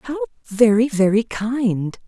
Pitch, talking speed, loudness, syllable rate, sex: 225 Hz, 115 wpm, -19 LUFS, 3.5 syllables/s, female